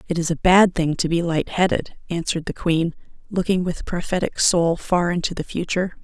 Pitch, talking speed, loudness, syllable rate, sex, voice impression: 175 Hz, 200 wpm, -21 LUFS, 5.4 syllables/s, female, feminine, adult-like, slightly fluent, slightly cute, slightly sincere, slightly calm, slightly kind